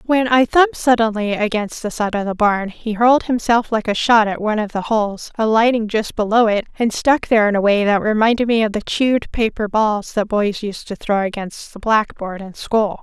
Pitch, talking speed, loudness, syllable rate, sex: 220 Hz, 225 wpm, -17 LUFS, 5.3 syllables/s, female